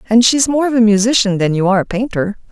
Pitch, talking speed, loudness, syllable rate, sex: 220 Hz, 260 wpm, -13 LUFS, 6.7 syllables/s, female